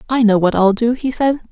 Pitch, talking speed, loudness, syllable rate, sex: 230 Hz, 275 wpm, -15 LUFS, 5.6 syllables/s, female